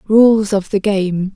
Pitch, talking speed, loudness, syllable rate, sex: 200 Hz, 175 wpm, -15 LUFS, 3.3 syllables/s, female